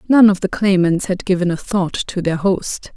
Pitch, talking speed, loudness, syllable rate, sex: 185 Hz, 225 wpm, -17 LUFS, 4.7 syllables/s, female